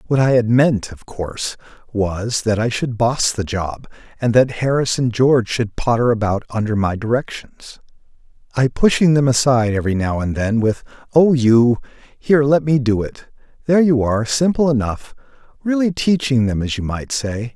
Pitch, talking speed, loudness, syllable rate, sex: 120 Hz, 175 wpm, -17 LUFS, 5.0 syllables/s, male